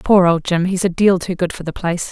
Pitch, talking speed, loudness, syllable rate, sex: 180 Hz, 315 wpm, -17 LUFS, 6.0 syllables/s, female